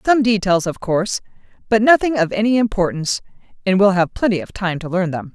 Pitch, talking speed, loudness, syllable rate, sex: 195 Hz, 200 wpm, -18 LUFS, 6.1 syllables/s, female